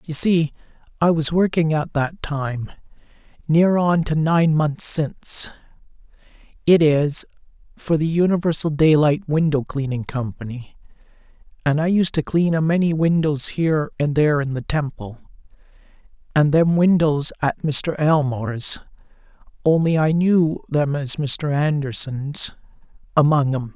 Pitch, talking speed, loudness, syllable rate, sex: 150 Hz, 120 wpm, -19 LUFS, 4.3 syllables/s, male